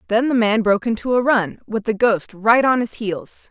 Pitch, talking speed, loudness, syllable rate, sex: 220 Hz, 240 wpm, -18 LUFS, 4.9 syllables/s, female